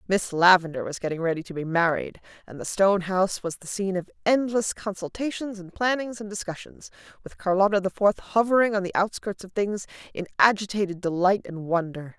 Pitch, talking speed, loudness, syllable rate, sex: 190 Hz, 180 wpm, -25 LUFS, 5.8 syllables/s, female